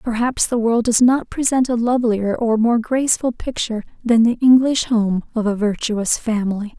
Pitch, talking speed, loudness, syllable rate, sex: 230 Hz, 175 wpm, -18 LUFS, 5.0 syllables/s, female